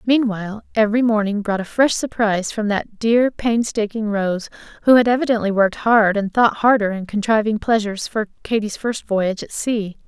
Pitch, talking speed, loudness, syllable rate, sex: 215 Hz, 175 wpm, -19 LUFS, 5.3 syllables/s, female